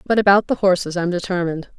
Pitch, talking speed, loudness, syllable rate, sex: 185 Hz, 200 wpm, -18 LUFS, 6.7 syllables/s, female